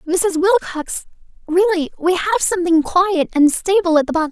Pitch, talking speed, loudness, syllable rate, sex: 350 Hz, 140 wpm, -16 LUFS, 5.2 syllables/s, female